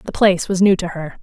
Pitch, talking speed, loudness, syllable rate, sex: 185 Hz, 295 wpm, -17 LUFS, 6.0 syllables/s, female